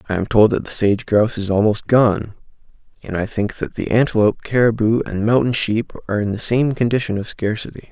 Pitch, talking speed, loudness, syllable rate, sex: 110 Hz, 205 wpm, -18 LUFS, 5.8 syllables/s, male